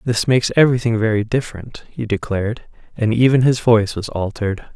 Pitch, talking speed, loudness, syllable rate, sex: 115 Hz, 165 wpm, -17 LUFS, 6.0 syllables/s, male